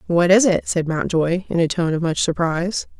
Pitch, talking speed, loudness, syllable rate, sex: 170 Hz, 220 wpm, -19 LUFS, 5.2 syllables/s, female